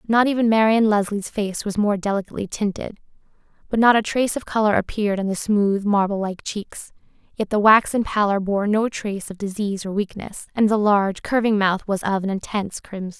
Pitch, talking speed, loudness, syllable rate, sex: 205 Hz, 195 wpm, -21 LUFS, 5.7 syllables/s, female